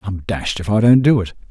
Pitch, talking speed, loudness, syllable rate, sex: 105 Hz, 280 wpm, -16 LUFS, 5.8 syllables/s, male